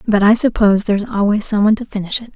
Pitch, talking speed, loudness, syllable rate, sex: 210 Hz, 255 wpm, -15 LUFS, 7.5 syllables/s, female